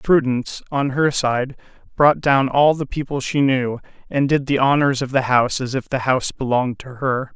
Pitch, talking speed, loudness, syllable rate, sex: 135 Hz, 205 wpm, -19 LUFS, 5.1 syllables/s, male